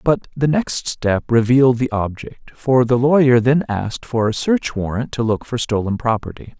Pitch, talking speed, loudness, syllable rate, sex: 120 Hz, 190 wpm, -18 LUFS, 4.7 syllables/s, male